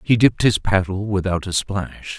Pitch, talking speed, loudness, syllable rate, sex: 100 Hz, 190 wpm, -20 LUFS, 4.8 syllables/s, male